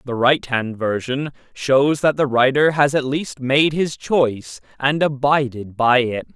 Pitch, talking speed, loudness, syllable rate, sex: 135 Hz, 160 wpm, -18 LUFS, 4.0 syllables/s, male